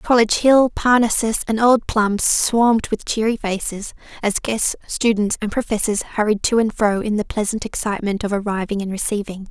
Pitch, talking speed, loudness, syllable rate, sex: 215 Hz, 170 wpm, -19 LUFS, 5.2 syllables/s, female